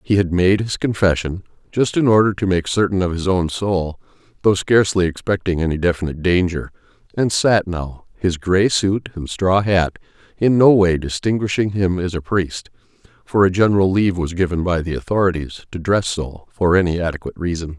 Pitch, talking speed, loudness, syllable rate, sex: 90 Hz, 180 wpm, -18 LUFS, 3.7 syllables/s, male